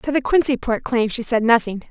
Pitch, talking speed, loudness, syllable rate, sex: 240 Hz, 250 wpm, -19 LUFS, 5.5 syllables/s, female